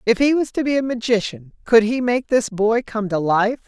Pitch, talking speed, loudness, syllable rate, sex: 230 Hz, 245 wpm, -19 LUFS, 5.1 syllables/s, female